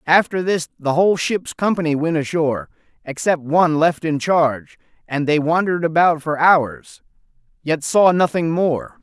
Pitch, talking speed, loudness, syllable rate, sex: 160 Hz, 155 wpm, -18 LUFS, 4.7 syllables/s, male